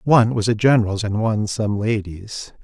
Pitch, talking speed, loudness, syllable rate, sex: 110 Hz, 180 wpm, -19 LUFS, 5.3 syllables/s, male